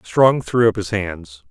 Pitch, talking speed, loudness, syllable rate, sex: 100 Hz, 200 wpm, -18 LUFS, 3.7 syllables/s, male